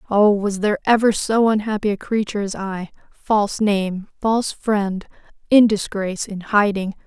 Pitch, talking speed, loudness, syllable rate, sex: 205 Hz, 155 wpm, -19 LUFS, 4.9 syllables/s, female